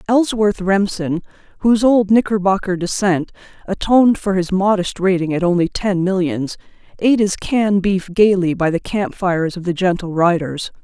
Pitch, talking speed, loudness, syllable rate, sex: 190 Hz, 150 wpm, -17 LUFS, 5.1 syllables/s, female